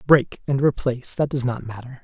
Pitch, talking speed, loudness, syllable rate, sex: 130 Hz, 205 wpm, -22 LUFS, 5.4 syllables/s, male